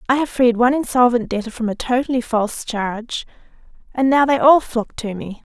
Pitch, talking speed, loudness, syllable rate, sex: 240 Hz, 195 wpm, -18 LUFS, 5.6 syllables/s, female